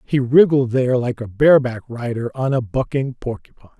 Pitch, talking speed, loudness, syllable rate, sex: 125 Hz, 175 wpm, -18 LUFS, 5.7 syllables/s, male